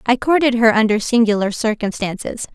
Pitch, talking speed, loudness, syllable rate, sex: 230 Hz, 140 wpm, -17 LUFS, 5.5 syllables/s, female